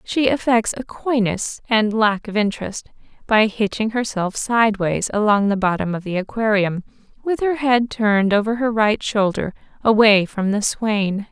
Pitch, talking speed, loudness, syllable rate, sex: 215 Hz, 160 wpm, -19 LUFS, 4.6 syllables/s, female